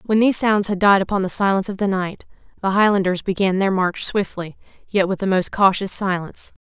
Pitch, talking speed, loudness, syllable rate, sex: 195 Hz, 210 wpm, -19 LUFS, 5.8 syllables/s, female